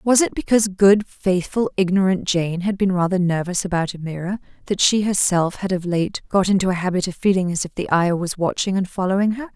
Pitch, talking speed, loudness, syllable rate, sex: 185 Hz, 215 wpm, -20 LUFS, 5.6 syllables/s, female